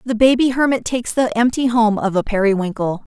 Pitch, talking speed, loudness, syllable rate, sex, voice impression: 230 Hz, 190 wpm, -17 LUFS, 5.7 syllables/s, female, feminine, slightly adult-like, slightly powerful, slightly clear, slightly intellectual